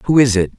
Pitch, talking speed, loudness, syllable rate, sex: 115 Hz, 310 wpm, -14 LUFS, 6.0 syllables/s, male